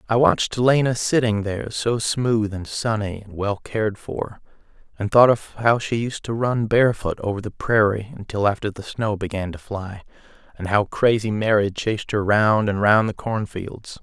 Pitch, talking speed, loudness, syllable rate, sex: 105 Hz, 185 wpm, -21 LUFS, 4.8 syllables/s, male